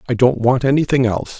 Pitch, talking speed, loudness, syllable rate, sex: 125 Hz, 215 wpm, -16 LUFS, 6.6 syllables/s, male